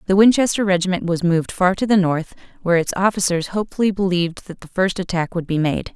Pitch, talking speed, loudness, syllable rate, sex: 185 Hz, 210 wpm, -19 LUFS, 6.4 syllables/s, female